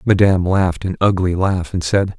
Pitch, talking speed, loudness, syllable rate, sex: 95 Hz, 190 wpm, -17 LUFS, 5.4 syllables/s, male